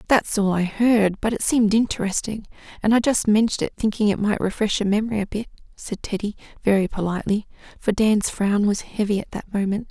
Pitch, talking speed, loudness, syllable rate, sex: 210 Hz, 200 wpm, -22 LUFS, 5.9 syllables/s, female